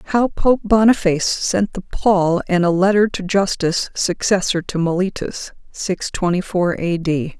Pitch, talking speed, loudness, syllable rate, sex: 185 Hz, 155 wpm, -18 LUFS, 3.7 syllables/s, female